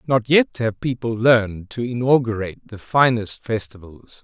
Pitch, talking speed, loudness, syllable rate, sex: 115 Hz, 140 wpm, -20 LUFS, 4.8 syllables/s, male